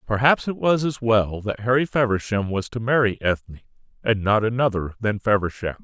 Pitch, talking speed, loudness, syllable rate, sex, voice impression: 110 Hz, 165 wpm, -22 LUFS, 5.3 syllables/s, male, very masculine, very adult-like, slightly thick, cool, sincere, slightly calm, slightly friendly